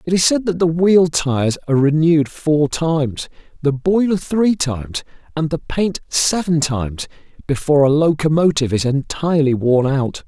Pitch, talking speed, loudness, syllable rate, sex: 155 Hz, 160 wpm, -17 LUFS, 5.0 syllables/s, male